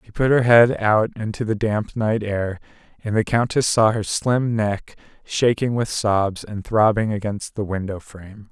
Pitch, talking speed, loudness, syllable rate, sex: 110 Hz, 185 wpm, -20 LUFS, 4.3 syllables/s, male